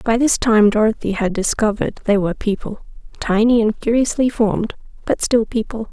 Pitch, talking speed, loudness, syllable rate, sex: 220 Hz, 160 wpm, -17 LUFS, 5.5 syllables/s, female